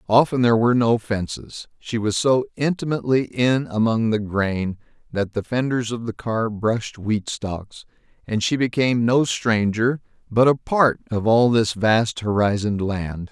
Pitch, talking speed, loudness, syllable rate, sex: 115 Hz, 160 wpm, -21 LUFS, 4.5 syllables/s, male